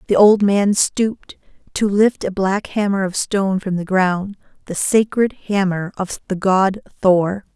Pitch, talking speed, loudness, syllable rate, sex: 195 Hz, 160 wpm, -18 LUFS, 4.1 syllables/s, female